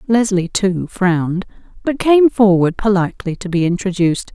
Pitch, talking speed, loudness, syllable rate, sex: 195 Hz, 140 wpm, -16 LUFS, 5.0 syllables/s, female